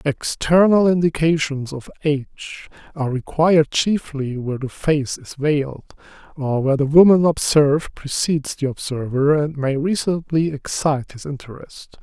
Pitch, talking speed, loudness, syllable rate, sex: 150 Hz, 130 wpm, -19 LUFS, 4.8 syllables/s, male